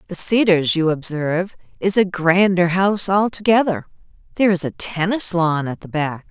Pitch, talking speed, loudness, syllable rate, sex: 180 Hz, 160 wpm, -18 LUFS, 5.0 syllables/s, female